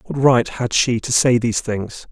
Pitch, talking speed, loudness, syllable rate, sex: 120 Hz, 225 wpm, -18 LUFS, 4.5 syllables/s, male